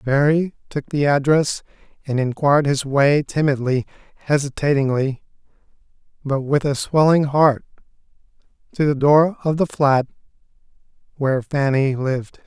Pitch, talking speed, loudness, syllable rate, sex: 140 Hz, 115 wpm, -19 LUFS, 4.6 syllables/s, male